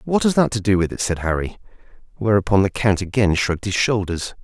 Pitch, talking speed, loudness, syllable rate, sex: 105 Hz, 215 wpm, -19 LUFS, 6.0 syllables/s, male